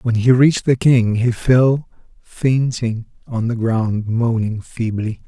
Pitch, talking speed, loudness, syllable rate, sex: 120 Hz, 150 wpm, -17 LUFS, 3.7 syllables/s, male